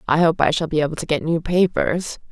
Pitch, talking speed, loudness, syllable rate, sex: 165 Hz, 260 wpm, -20 LUFS, 5.8 syllables/s, female